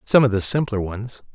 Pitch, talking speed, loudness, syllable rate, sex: 110 Hz, 225 wpm, -20 LUFS, 5.2 syllables/s, male